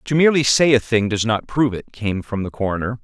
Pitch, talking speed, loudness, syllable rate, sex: 115 Hz, 255 wpm, -19 LUFS, 6.1 syllables/s, male